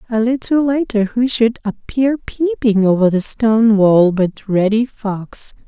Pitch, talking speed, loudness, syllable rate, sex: 225 Hz, 150 wpm, -15 LUFS, 4.0 syllables/s, female